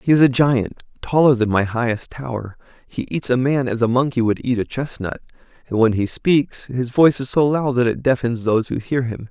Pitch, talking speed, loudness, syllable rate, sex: 125 Hz, 230 wpm, -19 LUFS, 5.3 syllables/s, male